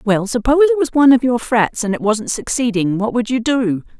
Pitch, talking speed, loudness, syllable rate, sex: 235 Hz, 240 wpm, -16 LUFS, 5.3 syllables/s, female